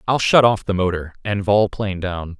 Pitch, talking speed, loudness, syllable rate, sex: 100 Hz, 225 wpm, -19 LUFS, 5.1 syllables/s, male